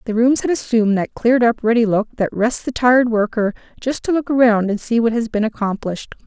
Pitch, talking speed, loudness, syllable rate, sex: 230 Hz, 230 wpm, -17 LUFS, 5.9 syllables/s, female